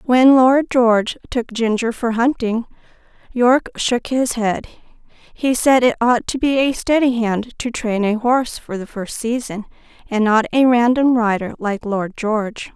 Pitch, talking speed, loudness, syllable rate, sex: 235 Hz, 170 wpm, -17 LUFS, 4.4 syllables/s, female